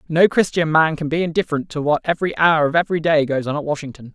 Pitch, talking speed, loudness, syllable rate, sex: 155 Hz, 245 wpm, -18 LUFS, 6.8 syllables/s, male